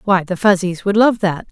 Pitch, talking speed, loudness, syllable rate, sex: 195 Hz, 235 wpm, -15 LUFS, 5.1 syllables/s, female